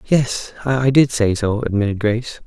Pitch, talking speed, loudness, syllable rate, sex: 115 Hz, 170 wpm, -18 LUFS, 4.5 syllables/s, male